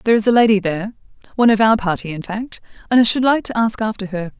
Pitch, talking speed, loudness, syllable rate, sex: 215 Hz, 230 wpm, -17 LUFS, 7.1 syllables/s, female